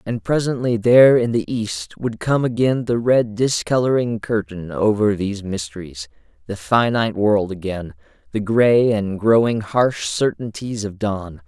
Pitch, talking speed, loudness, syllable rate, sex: 110 Hz, 145 wpm, -19 LUFS, 4.4 syllables/s, male